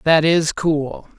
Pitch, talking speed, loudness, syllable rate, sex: 160 Hz, 150 wpm, -17 LUFS, 3.0 syllables/s, male